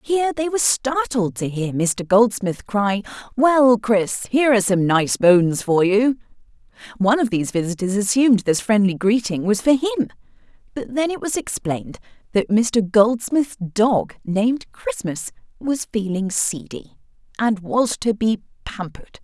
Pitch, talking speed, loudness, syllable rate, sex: 220 Hz, 150 wpm, -19 LUFS, 4.7 syllables/s, female